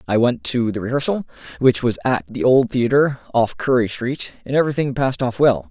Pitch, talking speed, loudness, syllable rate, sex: 125 Hz, 200 wpm, -19 LUFS, 5.5 syllables/s, male